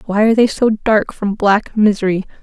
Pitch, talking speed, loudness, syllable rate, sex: 210 Hz, 200 wpm, -15 LUFS, 5.1 syllables/s, female